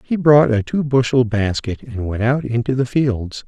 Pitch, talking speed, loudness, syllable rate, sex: 125 Hz, 205 wpm, -18 LUFS, 4.5 syllables/s, male